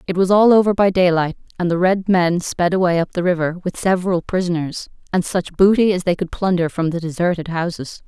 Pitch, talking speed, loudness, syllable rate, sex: 180 Hz, 215 wpm, -18 LUFS, 5.7 syllables/s, female